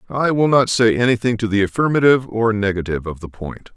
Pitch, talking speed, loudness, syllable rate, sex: 115 Hz, 205 wpm, -17 LUFS, 6.2 syllables/s, male